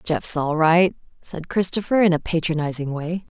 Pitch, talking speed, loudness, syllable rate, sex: 165 Hz, 160 wpm, -20 LUFS, 4.8 syllables/s, female